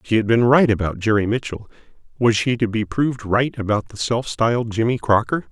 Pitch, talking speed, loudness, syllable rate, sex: 115 Hz, 205 wpm, -19 LUFS, 5.5 syllables/s, male